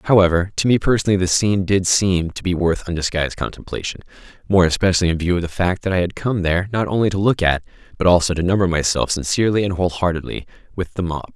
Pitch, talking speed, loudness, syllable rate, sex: 90 Hz, 210 wpm, -19 LUFS, 6.7 syllables/s, male